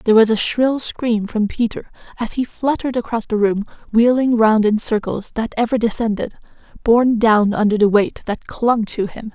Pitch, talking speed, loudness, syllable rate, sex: 225 Hz, 185 wpm, -18 LUFS, 5.0 syllables/s, female